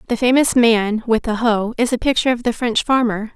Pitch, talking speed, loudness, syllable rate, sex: 230 Hz, 230 wpm, -17 LUFS, 5.5 syllables/s, female